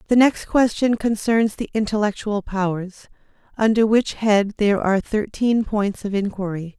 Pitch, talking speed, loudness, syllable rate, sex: 210 Hz, 140 wpm, -20 LUFS, 4.7 syllables/s, female